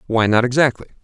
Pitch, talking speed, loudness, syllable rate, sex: 120 Hz, 175 wpm, -16 LUFS, 6.9 syllables/s, male